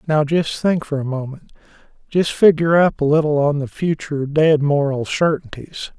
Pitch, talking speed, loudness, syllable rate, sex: 150 Hz, 160 wpm, -18 LUFS, 5.1 syllables/s, male